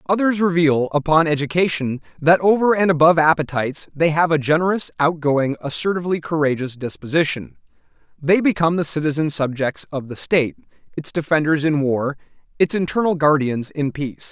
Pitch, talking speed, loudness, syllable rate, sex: 155 Hz, 145 wpm, -19 LUFS, 5.7 syllables/s, male